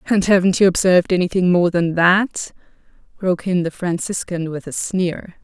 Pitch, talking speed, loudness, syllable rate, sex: 180 Hz, 165 wpm, -18 LUFS, 5.0 syllables/s, female